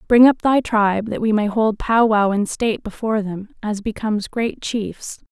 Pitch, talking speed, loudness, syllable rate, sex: 215 Hz, 205 wpm, -19 LUFS, 4.8 syllables/s, female